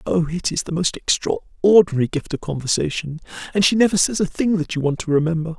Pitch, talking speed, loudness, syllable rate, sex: 165 Hz, 205 wpm, -19 LUFS, 5.9 syllables/s, male